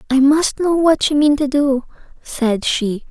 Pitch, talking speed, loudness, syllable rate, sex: 275 Hz, 195 wpm, -16 LUFS, 3.9 syllables/s, female